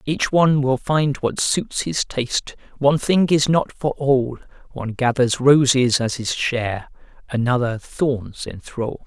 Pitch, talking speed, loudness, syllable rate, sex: 130 Hz, 150 wpm, -20 LUFS, 4.2 syllables/s, male